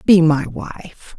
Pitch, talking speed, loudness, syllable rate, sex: 160 Hz, 150 wpm, -16 LUFS, 2.9 syllables/s, female